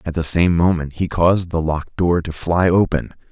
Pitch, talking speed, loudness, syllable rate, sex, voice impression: 85 Hz, 215 wpm, -18 LUFS, 5.3 syllables/s, male, very masculine, middle-aged, very thick, slightly tensed, slightly powerful, bright, soft, slightly muffled, slightly fluent, slightly raspy, cool, intellectual, slightly refreshing, sincere, very calm, very mature, friendly, reassuring, very unique, slightly elegant, wild, sweet, lively, kind